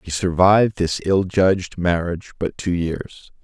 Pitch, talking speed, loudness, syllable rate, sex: 90 Hz, 155 wpm, -19 LUFS, 4.5 syllables/s, male